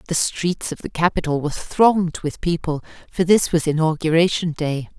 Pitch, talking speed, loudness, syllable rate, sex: 165 Hz, 170 wpm, -20 LUFS, 5.2 syllables/s, female